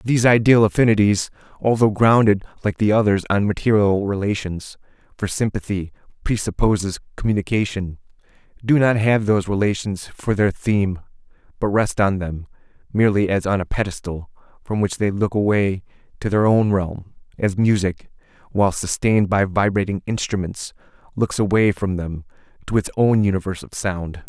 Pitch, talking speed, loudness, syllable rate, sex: 100 Hz, 145 wpm, -20 LUFS, 5.2 syllables/s, male